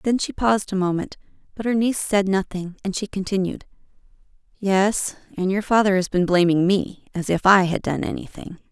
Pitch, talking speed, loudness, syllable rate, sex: 195 Hz, 170 wpm, -21 LUFS, 5.4 syllables/s, female